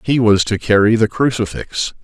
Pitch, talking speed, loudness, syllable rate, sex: 110 Hz, 175 wpm, -15 LUFS, 4.8 syllables/s, male